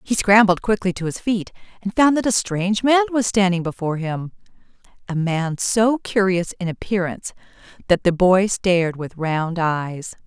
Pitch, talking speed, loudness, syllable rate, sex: 190 Hz, 165 wpm, -19 LUFS, 4.8 syllables/s, female